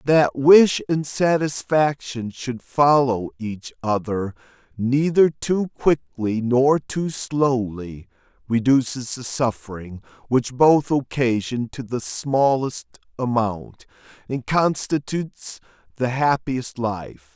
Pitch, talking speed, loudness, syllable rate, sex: 130 Hz, 100 wpm, -21 LUFS, 3.3 syllables/s, male